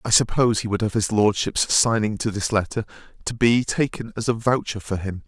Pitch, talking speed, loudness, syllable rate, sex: 110 Hz, 215 wpm, -22 LUFS, 5.5 syllables/s, male